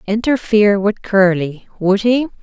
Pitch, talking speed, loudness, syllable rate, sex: 210 Hz, 125 wpm, -15 LUFS, 4.4 syllables/s, female